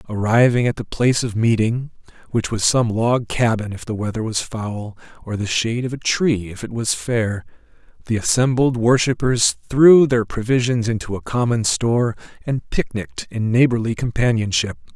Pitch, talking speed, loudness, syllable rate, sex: 115 Hz, 165 wpm, -19 LUFS, 4.9 syllables/s, male